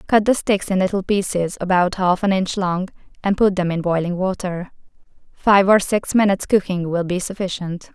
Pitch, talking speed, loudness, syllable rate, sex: 190 Hz, 190 wpm, -19 LUFS, 5.2 syllables/s, female